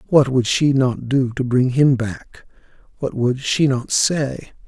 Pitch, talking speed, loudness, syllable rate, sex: 130 Hz, 180 wpm, -18 LUFS, 3.7 syllables/s, male